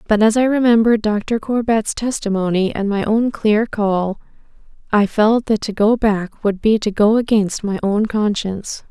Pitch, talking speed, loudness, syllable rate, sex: 215 Hz, 175 wpm, -17 LUFS, 4.5 syllables/s, female